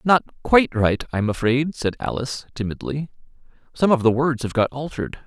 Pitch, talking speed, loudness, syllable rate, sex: 135 Hz, 170 wpm, -21 LUFS, 5.5 syllables/s, male